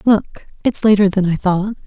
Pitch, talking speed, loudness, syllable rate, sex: 200 Hz, 195 wpm, -16 LUFS, 5.4 syllables/s, female